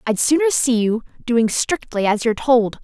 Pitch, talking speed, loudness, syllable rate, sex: 240 Hz, 190 wpm, -18 LUFS, 4.8 syllables/s, female